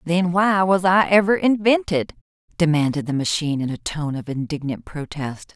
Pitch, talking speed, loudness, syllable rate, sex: 165 Hz, 160 wpm, -20 LUFS, 5.0 syllables/s, female